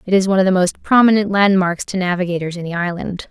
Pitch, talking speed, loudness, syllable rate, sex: 185 Hz, 235 wpm, -16 LUFS, 6.5 syllables/s, female